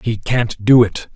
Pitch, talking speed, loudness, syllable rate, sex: 115 Hz, 210 wpm, -15 LUFS, 3.9 syllables/s, male